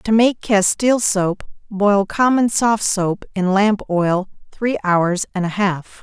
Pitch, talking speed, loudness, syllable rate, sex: 200 Hz, 160 wpm, -17 LUFS, 3.7 syllables/s, female